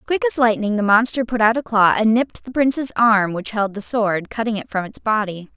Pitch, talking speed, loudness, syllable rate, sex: 225 Hz, 250 wpm, -18 LUFS, 5.5 syllables/s, female